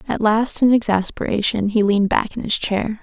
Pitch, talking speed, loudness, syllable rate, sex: 215 Hz, 200 wpm, -18 LUFS, 5.2 syllables/s, female